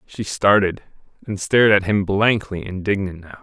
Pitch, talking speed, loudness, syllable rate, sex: 100 Hz, 160 wpm, -19 LUFS, 4.9 syllables/s, male